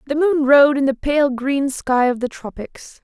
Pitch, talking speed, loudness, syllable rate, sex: 275 Hz, 220 wpm, -17 LUFS, 4.2 syllables/s, female